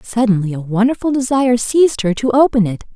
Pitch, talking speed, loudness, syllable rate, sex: 230 Hz, 185 wpm, -15 LUFS, 6.2 syllables/s, female